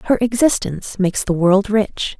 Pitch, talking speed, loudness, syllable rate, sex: 205 Hz, 165 wpm, -17 LUFS, 5.0 syllables/s, female